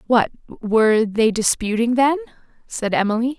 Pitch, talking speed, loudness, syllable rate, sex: 235 Hz, 125 wpm, -19 LUFS, 4.6 syllables/s, female